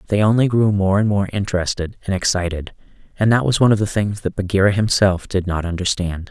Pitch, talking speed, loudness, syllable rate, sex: 100 Hz, 210 wpm, -18 LUFS, 6.1 syllables/s, male